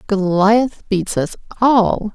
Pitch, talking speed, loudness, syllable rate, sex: 200 Hz, 110 wpm, -16 LUFS, 2.9 syllables/s, female